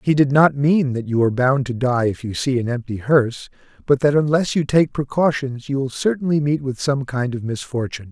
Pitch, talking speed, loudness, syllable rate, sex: 135 Hz, 230 wpm, -19 LUFS, 5.5 syllables/s, male